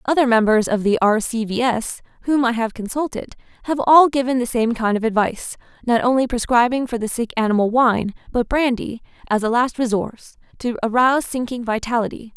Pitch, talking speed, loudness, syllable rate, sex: 240 Hz, 185 wpm, -19 LUFS, 5.6 syllables/s, female